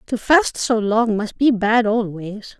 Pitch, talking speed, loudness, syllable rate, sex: 225 Hz, 185 wpm, -18 LUFS, 3.6 syllables/s, female